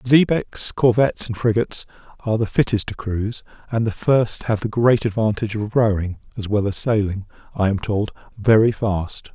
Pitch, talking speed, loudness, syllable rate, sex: 110 Hz, 175 wpm, -20 LUFS, 5.2 syllables/s, male